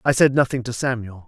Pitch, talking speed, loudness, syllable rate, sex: 125 Hz, 235 wpm, -20 LUFS, 6.0 syllables/s, male